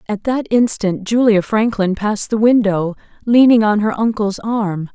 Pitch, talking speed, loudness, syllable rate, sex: 215 Hz, 160 wpm, -15 LUFS, 4.4 syllables/s, female